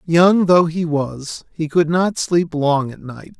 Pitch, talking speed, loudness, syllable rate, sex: 160 Hz, 195 wpm, -17 LUFS, 3.5 syllables/s, male